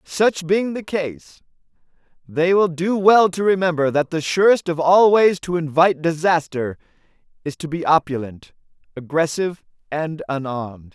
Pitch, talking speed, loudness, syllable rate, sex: 165 Hz, 145 wpm, -19 LUFS, 4.7 syllables/s, male